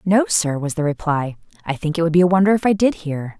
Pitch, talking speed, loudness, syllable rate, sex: 165 Hz, 285 wpm, -18 LUFS, 6.0 syllables/s, female